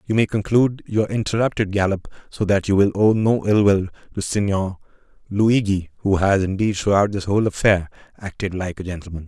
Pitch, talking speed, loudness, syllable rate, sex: 100 Hz, 180 wpm, -20 LUFS, 5.6 syllables/s, male